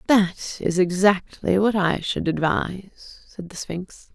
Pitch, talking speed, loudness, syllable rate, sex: 185 Hz, 145 wpm, -22 LUFS, 3.6 syllables/s, female